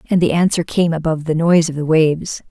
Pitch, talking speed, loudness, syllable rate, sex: 165 Hz, 240 wpm, -16 LUFS, 6.4 syllables/s, female